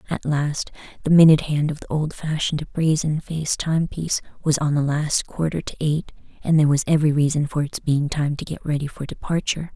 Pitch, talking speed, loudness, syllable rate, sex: 150 Hz, 195 wpm, -21 LUFS, 5.9 syllables/s, female